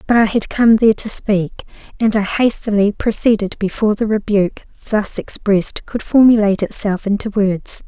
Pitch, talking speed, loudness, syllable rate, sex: 210 Hz, 160 wpm, -16 LUFS, 5.3 syllables/s, female